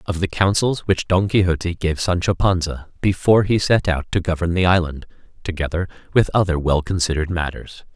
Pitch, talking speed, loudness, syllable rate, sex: 90 Hz, 175 wpm, -19 LUFS, 5.6 syllables/s, male